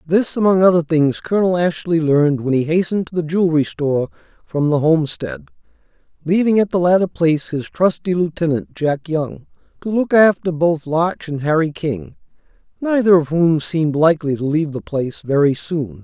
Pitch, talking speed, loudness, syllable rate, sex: 160 Hz, 170 wpm, -17 LUFS, 5.4 syllables/s, male